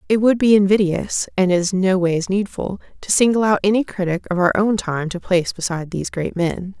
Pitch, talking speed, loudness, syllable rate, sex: 190 Hz, 205 wpm, -18 LUFS, 5.5 syllables/s, female